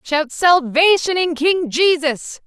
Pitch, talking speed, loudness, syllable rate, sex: 325 Hz, 120 wpm, -16 LUFS, 3.4 syllables/s, female